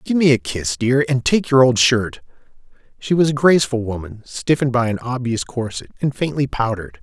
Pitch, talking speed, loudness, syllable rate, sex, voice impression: 125 Hz, 195 wpm, -18 LUFS, 5.5 syllables/s, male, masculine, adult-like, slightly muffled, slightly refreshing, sincere, friendly, slightly elegant